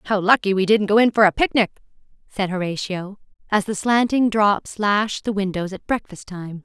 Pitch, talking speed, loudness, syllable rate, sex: 205 Hz, 190 wpm, -20 LUFS, 5.0 syllables/s, female